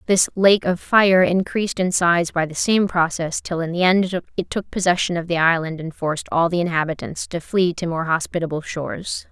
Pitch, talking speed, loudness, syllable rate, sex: 175 Hz, 205 wpm, -20 LUFS, 5.2 syllables/s, female